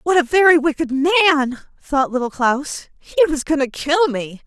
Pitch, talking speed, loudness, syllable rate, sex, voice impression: 295 Hz, 190 wpm, -17 LUFS, 4.9 syllables/s, female, very feminine, very middle-aged, slightly thin, tensed, slightly powerful, slightly bright, hard, clear, fluent, slightly raspy, slightly cool, slightly intellectual, slightly refreshing, slightly sincere, slightly calm, slightly friendly, slightly reassuring, very unique, slightly elegant, wild, lively, very strict, very intense, very sharp